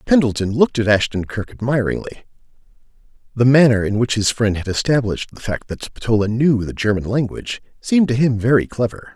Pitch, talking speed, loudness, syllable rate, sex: 115 Hz, 175 wpm, -18 LUFS, 6.0 syllables/s, male